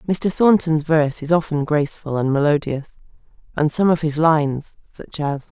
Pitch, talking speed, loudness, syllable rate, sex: 155 Hz, 160 wpm, -19 LUFS, 5.3 syllables/s, female